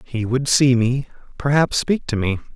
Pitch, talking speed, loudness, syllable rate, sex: 130 Hz, 190 wpm, -19 LUFS, 4.4 syllables/s, male